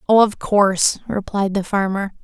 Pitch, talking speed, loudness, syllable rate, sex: 200 Hz, 160 wpm, -18 LUFS, 4.7 syllables/s, female